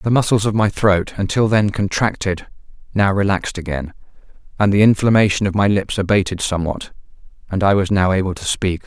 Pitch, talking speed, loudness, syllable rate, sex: 100 Hz, 175 wpm, -17 LUFS, 5.8 syllables/s, male